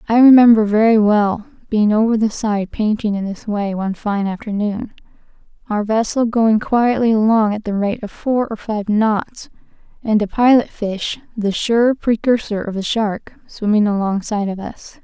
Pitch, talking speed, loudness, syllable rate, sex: 215 Hz, 170 wpm, -17 LUFS, 4.6 syllables/s, female